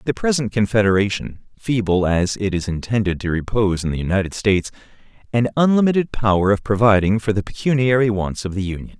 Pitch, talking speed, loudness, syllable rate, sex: 105 Hz, 175 wpm, -19 LUFS, 6.1 syllables/s, male